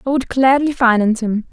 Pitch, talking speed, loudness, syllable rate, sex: 245 Hz, 195 wpm, -15 LUFS, 5.8 syllables/s, female